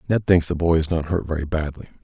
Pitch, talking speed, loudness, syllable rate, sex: 85 Hz, 265 wpm, -21 LUFS, 6.3 syllables/s, male